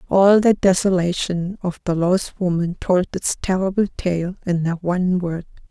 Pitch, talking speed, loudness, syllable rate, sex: 180 Hz, 160 wpm, -20 LUFS, 4.4 syllables/s, female